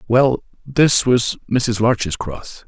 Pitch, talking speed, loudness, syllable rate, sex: 120 Hz, 135 wpm, -17 LUFS, 2.8 syllables/s, male